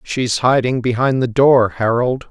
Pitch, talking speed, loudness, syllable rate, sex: 125 Hz, 155 wpm, -15 LUFS, 4.1 syllables/s, male